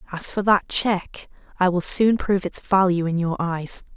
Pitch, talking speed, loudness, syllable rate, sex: 185 Hz, 195 wpm, -21 LUFS, 4.6 syllables/s, female